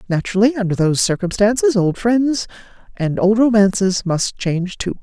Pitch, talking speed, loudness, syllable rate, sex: 205 Hz, 120 wpm, -17 LUFS, 5.3 syllables/s, female